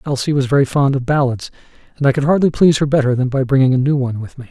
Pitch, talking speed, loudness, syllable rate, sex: 135 Hz, 280 wpm, -15 LUFS, 7.4 syllables/s, male